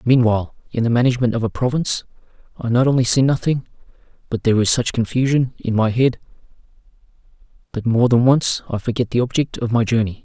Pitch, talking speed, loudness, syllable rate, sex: 120 Hz, 180 wpm, -18 LUFS, 6.4 syllables/s, male